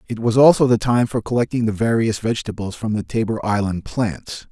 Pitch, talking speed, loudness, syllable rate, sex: 110 Hz, 200 wpm, -19 LUFS, 5.5 syllables/s, male